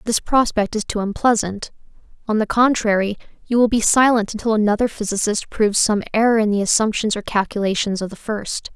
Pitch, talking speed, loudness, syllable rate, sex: 215 Hz, 180 wpm, -18 LUFS, 5.7 syllables/s, female